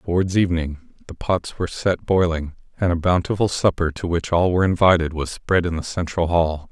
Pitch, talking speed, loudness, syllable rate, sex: 85 Hz, 195 wpm, -21 LUFS, 5.6 syllables/s, male